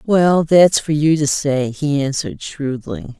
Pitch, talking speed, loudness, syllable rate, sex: 150 Hz, 170 wpm, -16 LUFS, 3.9 syllables/s, female